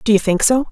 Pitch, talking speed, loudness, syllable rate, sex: 220 Hz, 340 wpm, -15 LUFS, 6.7 syllables/s, female